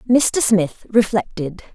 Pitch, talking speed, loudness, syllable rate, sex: 210 Hz, 105 wpm, -18 LUFS, 3.5 syllables/s, female